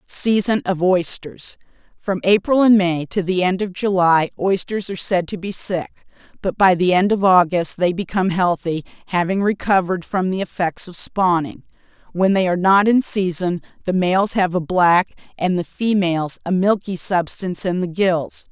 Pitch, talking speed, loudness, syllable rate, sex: 185 Hz, 170 wpm, -18 LUFS, 4.9 syllables/s, female